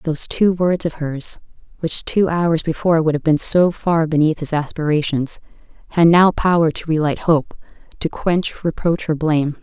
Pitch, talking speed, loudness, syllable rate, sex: 160 Hz, 180 wpm, -18 LUFS, 4.8 syllables/s, female